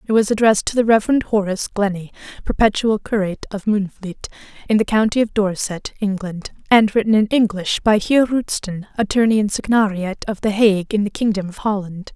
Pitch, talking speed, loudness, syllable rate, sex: 205 Hz, 180 wpm, -18 LUFS, 5.7 syllables/s, female